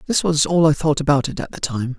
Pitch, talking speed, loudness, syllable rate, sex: 145 Hz, 300 wpm, -19 LUFS, 6.0 syllables/s, male